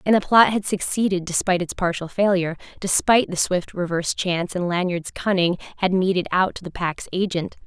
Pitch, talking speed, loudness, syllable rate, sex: 185 Hz, 190 wpm, -21 LUFS, 5.8 syllables/s, female